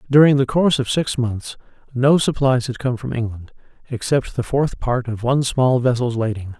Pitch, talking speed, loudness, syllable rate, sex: 125 Hz, 190 wpm, -19 LUFS, 5.1 syllables/s, male